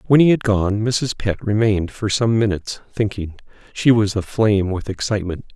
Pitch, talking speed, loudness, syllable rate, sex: 105 Hz, 175 wpm, -19 LUFS, 5.5 syllables/s, male